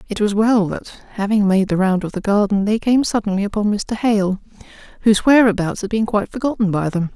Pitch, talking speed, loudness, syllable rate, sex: 205 Hz, 210 wpm, -18 LUFS, 5.7 syllables/s, female